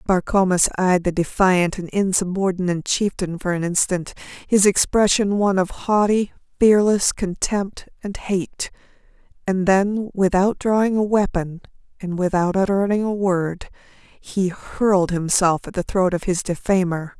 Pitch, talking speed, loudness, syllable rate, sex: 190 Hz, 140 wpm, -20 LUFS, 4.4 syllables/s, female